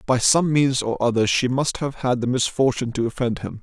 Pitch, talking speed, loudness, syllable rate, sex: 125 Hz, 230 wpm, -21 LUFS, 5.4 syllables/s, male